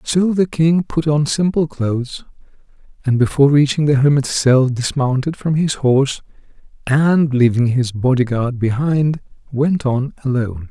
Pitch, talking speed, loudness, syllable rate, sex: 140 Hz, 145 wpm, -16 LUFS, 4.6 syllables/s, male